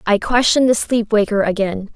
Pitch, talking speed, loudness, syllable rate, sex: 215 Hz, 185 wpm, -16 LUFS, 5.5 syllables/s, female